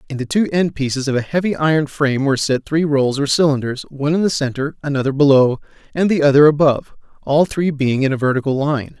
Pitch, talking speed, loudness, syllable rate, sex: 145 Hz, 205 wpm, -17 LUFS, 6.2 syllables/s, male